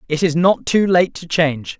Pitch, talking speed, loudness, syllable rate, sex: 165 Hz, 235 wpm, -16 LUFS, 5.0 syllables/s, male